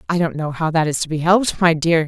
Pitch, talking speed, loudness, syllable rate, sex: 165 Hz, 320 wpm, -18 LUFS, 6.4 syllables/s, female